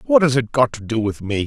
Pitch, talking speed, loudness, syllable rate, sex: 125 Hz, 330 wpm, -19 LUFS, 5.6 syllables/s, male